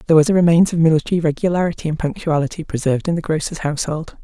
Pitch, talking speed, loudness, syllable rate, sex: 160 Hz, 200 wpm, -18 LUFS, 7.7 syllables/s, female